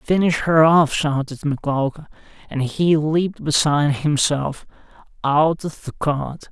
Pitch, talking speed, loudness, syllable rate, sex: 150 Hz, 130 wpm, -19 LUFS, 3.8 syllables/s, male